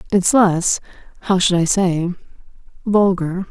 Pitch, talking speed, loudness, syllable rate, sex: 185 Hz, 85 wpm, -17 LUFS, 4.0 syllables/s, female